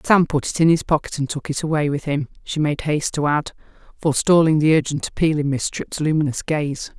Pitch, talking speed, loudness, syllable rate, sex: 150 Hz, 225 wpm, -20 LUFS, 5.8 syllables/s, female